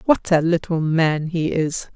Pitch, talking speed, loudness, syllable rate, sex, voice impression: 165 Hz, 185 wpm, -20 LUFS, 3.9 syllables/s, female, feminine, adult-like, slightly muffled, slightly unique